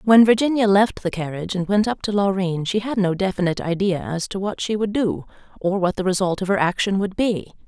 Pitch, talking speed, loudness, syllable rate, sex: 195 Hz, 235 wpm, -21 LUFS, 5.9 syllables/s, female